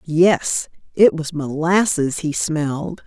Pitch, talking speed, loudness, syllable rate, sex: 160 Hz, 115 wpm, -19 LUFS, 3.3 syllables/s, female